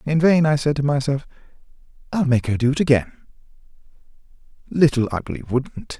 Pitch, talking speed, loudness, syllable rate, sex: 140 Hz, 150 wpm, -20 LUFS, 5.5 syllables/s, male